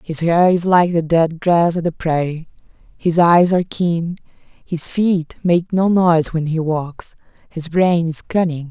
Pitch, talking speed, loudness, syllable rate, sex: 170 Hz, 180 wpm, -17 LUFS, 4.0 syllables/s, female